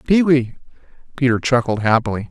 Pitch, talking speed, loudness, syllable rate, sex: 125 Hz, 130 wpm, -17 LUFS, 5.8 syllables/s, male